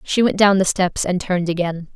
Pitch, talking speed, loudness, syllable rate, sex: 185 Hz, 245 wpm, -18 LUFS, 5.5 syllables/s, female